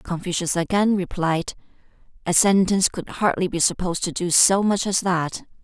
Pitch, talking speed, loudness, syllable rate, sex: 180 Hz, 160 wpm, -21 LUFS, 5.2 syllables/s, female